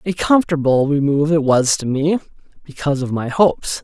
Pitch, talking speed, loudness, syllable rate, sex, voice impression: 150 Hz, 170 wpm, -17 LUFS, 5.8 syllables/s, male, masculine, adult-like, slightly halting, slightly unique